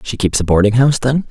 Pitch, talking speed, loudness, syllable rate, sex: 120 Hz, 275 wpm, -14 LUFS, 6.6 syllables/s, male